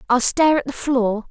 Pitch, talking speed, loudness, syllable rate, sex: 260 Hz, 230 wpm, -18 LUFS, 5.3 syllables/s, female